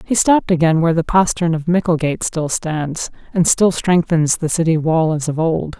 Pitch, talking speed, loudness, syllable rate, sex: 165 Hz, 195 wpm, -16 LUFS, 5.1 syllables/s, female